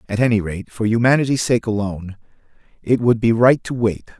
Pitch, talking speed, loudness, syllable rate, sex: 110 Hz, 185 wpm, -18 LUFS, 5.9 syllables/s, male